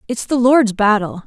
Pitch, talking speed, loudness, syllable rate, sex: 225 Hz, 190 wpm, -15 LUFS, 4.7 syllables/s, female